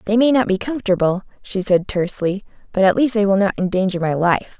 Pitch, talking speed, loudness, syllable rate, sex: 200 Hz, 220 wpm, -18 LUFS, 6.1 syllables/s, female